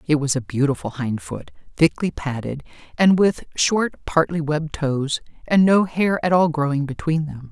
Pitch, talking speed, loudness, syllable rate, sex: 155 Hz, 170 wpm, -20 LUFS, 4.8 syllables/s, female